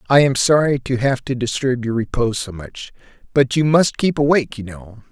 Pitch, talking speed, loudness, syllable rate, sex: 130 Hz, 210 wpm, -18 LUFS, 5.4 syllables/s, male